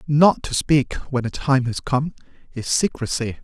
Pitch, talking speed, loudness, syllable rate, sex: 135 Hz, 175 wpm, -21 LUFS, 4.2 syllables/s, male